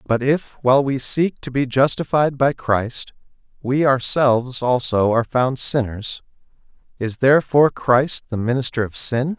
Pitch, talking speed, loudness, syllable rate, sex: 130 Hz, 145 wpm, -19 LUFS, 4.5 syllables/s, male